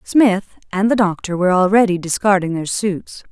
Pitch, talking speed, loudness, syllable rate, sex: 195 Hz, 165 wpm, -17 LUFS, 5.0 syllables/s, female